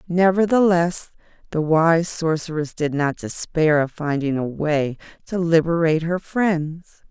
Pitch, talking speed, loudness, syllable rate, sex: 160 Hz, 125 wpm, -20 LUFS, 4.2 syllables/s, female